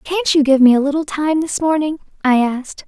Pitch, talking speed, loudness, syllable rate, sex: 290 Hz, 230 wpm, -16 LUFS, 5.6 syllables/s, female